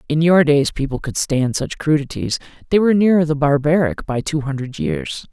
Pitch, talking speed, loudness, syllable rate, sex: 145 Hz, 190 wpm, -18 LUFS, 5.2 syllables/s, male